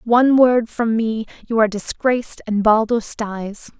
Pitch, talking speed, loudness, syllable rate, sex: 225 Hz, 160 wpm, -18 LUFS, 4.4 syllables/s, female